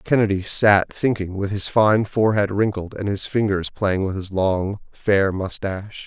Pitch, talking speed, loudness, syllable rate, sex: 100 Hz, 170 wpm, -21 LUFS, 4.4 syllables/s, male